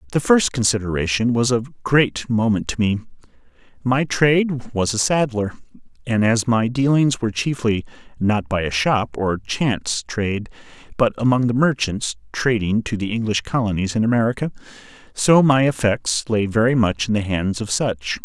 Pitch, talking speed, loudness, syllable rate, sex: 115 Hz, 160 wpm, -20 LUFS, 4.8 syllables/s, male